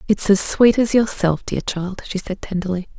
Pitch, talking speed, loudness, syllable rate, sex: 195 Hz, 200 wpm, -18 LUFS, 4.8 syllables/s, female